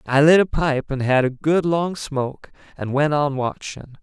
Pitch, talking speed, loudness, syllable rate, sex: 145 Hz, 210 wpm, -20 LUFS, 4.7 syllables/s, male